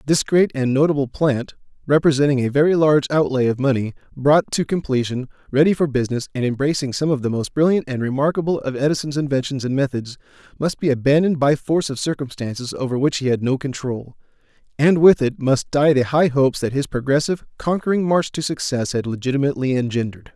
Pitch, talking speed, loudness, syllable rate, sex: 140 Hz, 185 wpm, -19 LUFS, 6.2 syllables/s, male